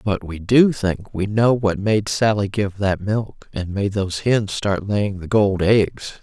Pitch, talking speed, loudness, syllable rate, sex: 100 Hz, 200 wpm, -20 LUFS, 3.8 syllables/s, female